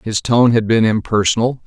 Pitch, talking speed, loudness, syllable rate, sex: 115 Hz, 180 wpm, -15 LUFS, 5.1 syllables/s, male